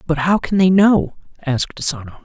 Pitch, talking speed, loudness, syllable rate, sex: 165 Hz, 190 wpm, -16 LUFS, 5.6 syllables/s, male